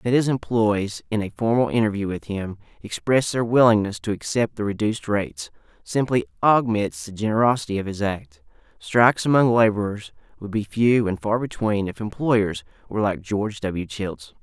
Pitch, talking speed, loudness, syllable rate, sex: 110 Hz, 165 wpm, -22 LUFS, 5.2 syllables/s, male